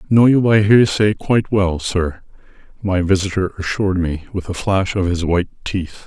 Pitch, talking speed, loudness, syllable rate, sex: 95 Hz, 180 wpm, -17 LUFS, 5.1 syllables/s, male